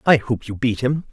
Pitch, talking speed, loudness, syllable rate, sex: 125 Hz, 270 wpm, -20 LUFS, 5.2 syllables/s, male